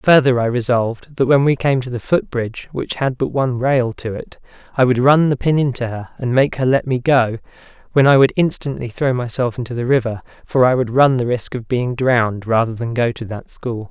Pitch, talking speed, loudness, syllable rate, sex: 125 Hz, 235 wpm, -17 LUFS, 5.4 syllables/s, male